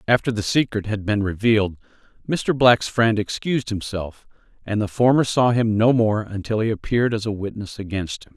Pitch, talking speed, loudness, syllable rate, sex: 110 Hz, 185 wpm, -21 LUFS, 5.3 syllables/s, male